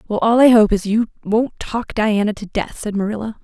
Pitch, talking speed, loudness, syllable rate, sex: 215 Hz, 225 wpm, -17 LUFS, 5.3 syllables/s, female